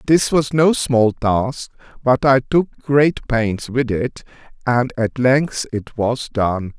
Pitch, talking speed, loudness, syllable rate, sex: 125 Hz, 160 wpm, -18 LUFS, 3.1 syllables/s, male